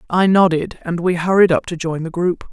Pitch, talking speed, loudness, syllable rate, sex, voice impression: 175 Hz, 240 wpm, -17 LUFS, 5.3 syllables/s, female, very feminine, middle-aged, slightly thin, tensed, very powerful, slightly dark, soft, clear, fluent, cool, intellectual, slightly refreshing, slightly sincere, calm, slightly friendly, slightly reassuring, very unique, slightly elegant, wild, slightly sweet, lively, strict, slightly intense, sharp